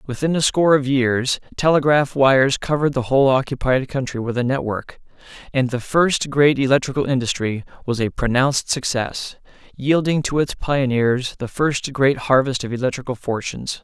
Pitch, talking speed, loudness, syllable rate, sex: 130 Hz, 155 wpm, -19 LUFS, 5.2 syllables/s, male